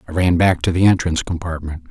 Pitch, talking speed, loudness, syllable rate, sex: 85 Hz, 220 wpm, -17 LUFS, 6.5 syllables/s, male